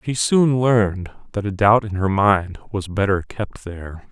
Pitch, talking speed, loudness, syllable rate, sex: 105 Hz, 190 wpm, -19 LUFS, 4.4 syllables/s, male